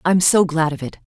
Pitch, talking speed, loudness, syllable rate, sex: 165 Hz, 270 wpm, -17 LUFS, 5.3 syllables/s, female